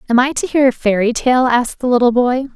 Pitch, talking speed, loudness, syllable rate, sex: 250 Hz, 260 wpm, -14 LUFS, 6.1 syllables/s, female